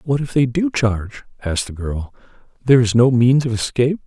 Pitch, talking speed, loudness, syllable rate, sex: 125 Hz, 205 wpm, -17 LUFS, 6.4 syllables/s, male